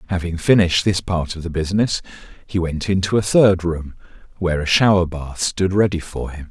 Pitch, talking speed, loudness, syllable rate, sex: 90 Hz, 195 wpm, -19 LUFS, 5.6 syllables/s, male